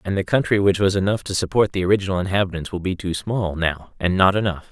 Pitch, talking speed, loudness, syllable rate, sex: 95 Hz, 240 wpm, -20 LUFS, 6.4 syllables/s, male